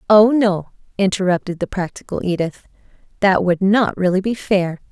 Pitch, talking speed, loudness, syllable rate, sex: 190 Hz, 145 wpm, -18 LUFS, 5.0 syllables/s, female